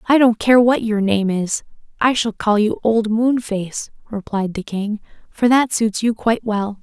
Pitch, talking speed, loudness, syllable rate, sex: 220 Hz, 195 wpm, -18 LUFS, 4.5 syllables/s, female